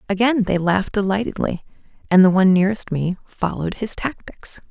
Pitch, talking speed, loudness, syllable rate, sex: 195 Hz, 155 wpm, -19 LUFS, 5.9 syllables/s, female